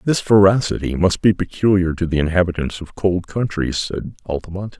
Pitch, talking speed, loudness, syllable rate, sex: 90 Hz, 165 wpm, -18 LUFS, 5.3 syllables/s, male